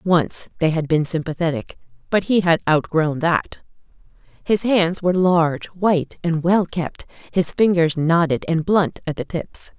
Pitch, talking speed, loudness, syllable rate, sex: 170 Hz, 160 wpm, -19 LUFS, 4.3 syllables/s, female